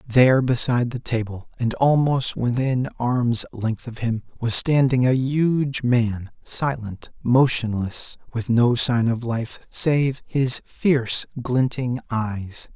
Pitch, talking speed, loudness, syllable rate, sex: 125 Hz, 130 wpm, -21 LUFS, 3.5 syllables/s, male